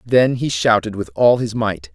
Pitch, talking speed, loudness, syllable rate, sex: 110 Hz, 215 wpm, -17 LUFS, 4.4 syllables/s, male